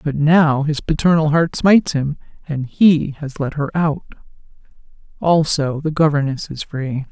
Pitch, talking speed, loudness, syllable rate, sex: 150 Hz, 150 wpm, -17 LUFS, 4.4 syllables/s, female